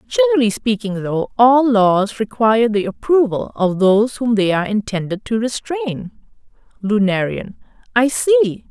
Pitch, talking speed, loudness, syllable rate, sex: 230 Hz, 130 wpm, -17 LUFS, 4.9 syllables/s, female